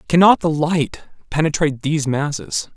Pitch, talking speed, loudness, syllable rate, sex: 150 Hz, 130 wpm, -18 LUFS, 5.0 syllables/s, male